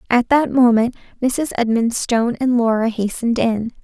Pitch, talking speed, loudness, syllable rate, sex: 240 Hz, 140 wpm, -17 LUFS, 5.0 syllables/s, female